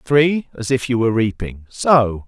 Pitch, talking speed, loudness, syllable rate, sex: 120 Hz, 160 wpm, -17 LUFS, 4.3 syllables/s, male